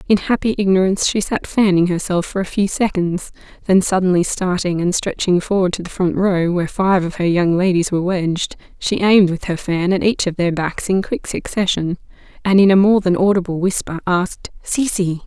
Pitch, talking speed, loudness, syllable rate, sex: 185 Hz, 200 wpm, -17 LUFS, 5.4 syllables/s, female